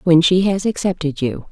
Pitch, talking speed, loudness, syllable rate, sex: 175 Hz, 200 wpm, -17 LUFS, 5.1 syllables/s, female